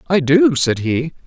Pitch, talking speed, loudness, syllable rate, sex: 155 Hz, 190 wpm, -15 LUFS, 3.9 syllables/s, male